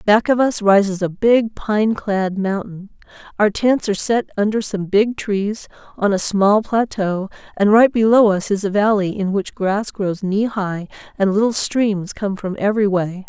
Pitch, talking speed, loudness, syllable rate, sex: 205 Hz, 185 wpm, -18 LUFS, 4.4 syllables/s, female